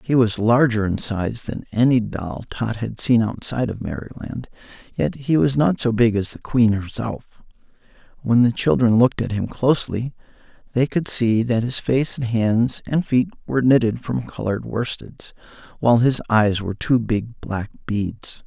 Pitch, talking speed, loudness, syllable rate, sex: 115 Hz, 175 wpm, -20 LUFS, 4.7 syllables/s, male